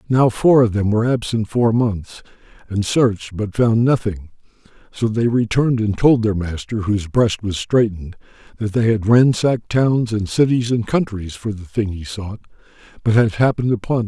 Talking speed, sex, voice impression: 190 wpm, male, very masculine, slightly old, slightly relaxed, slightly weak, slightly muffled, calm, mature, reassuring, kind, slightly modest